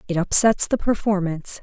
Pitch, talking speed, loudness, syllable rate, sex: 190 Hz, 150 wpm, -19 LUFS, 5.5 syllables/s, female